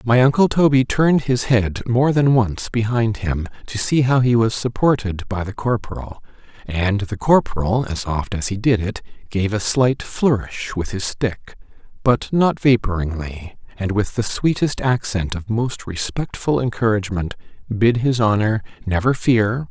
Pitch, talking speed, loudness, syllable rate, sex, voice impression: 115 Hz, 160 wpm, -19 LUFS, 4.4 syllables/s, male, very masculine, very middle-aged, very thick, tensed, very powerful, dark, slightly soft, muffled, fluent, slightly raspy, cool, very intellectual, refreshing, sincere, very calm, very mature, very friendly, very reassuring, unique, elegant, very wild, sweet, slightly lively, very kind, slightly modest